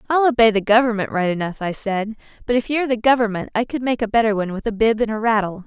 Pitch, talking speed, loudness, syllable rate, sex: 220 Hz, 265 wpm, -19 LUFS, 6.9 syllables/s, female